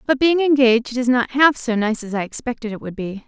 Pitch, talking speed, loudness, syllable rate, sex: 245 Hz, 255 wpm, -18 LUFS, 5.7 syllables/s, female